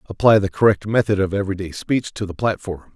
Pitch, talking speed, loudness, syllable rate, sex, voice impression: 100 Hz, 205 wpm, -19 LUFS, 6.0 syllables/s, male, masculine, middle-aged, thick, tensed, powerful, hard, clear, fluent, slightly cool, calm, mature, wild, strict, slightly intense, slightly sharp